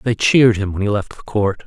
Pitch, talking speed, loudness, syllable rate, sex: 105 Hz, 290 wpm, -17 LUFS, 5.7 syllables/s, male